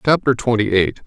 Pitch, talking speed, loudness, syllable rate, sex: 120 Hz, 170 wpm, -17 LUFS, 5.2 syllables/s, male